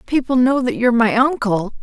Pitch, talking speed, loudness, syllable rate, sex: 240 Hz, 195 wpm, -16 LUFS, 5.6 syllables/s, female